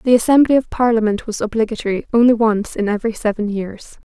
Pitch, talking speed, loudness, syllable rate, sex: 225 Hz, 175 wpm, -17 LUFS, 6.2 syllables/s, female